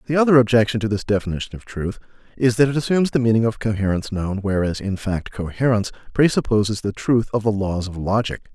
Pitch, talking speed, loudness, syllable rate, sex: 110 Hz, 205 wpm, -20 LUFS, 6.5 syllables/s, male